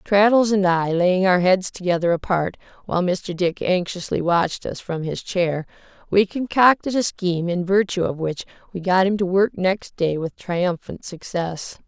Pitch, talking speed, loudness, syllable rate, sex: 185 Hz, 175 wpm, -21 LUFS, 4.6 syllables/s, female